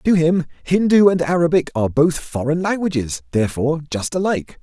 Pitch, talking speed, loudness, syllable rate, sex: 160 Hz, 155 wpm, -18 LUFS, 5.8 syllables/s, male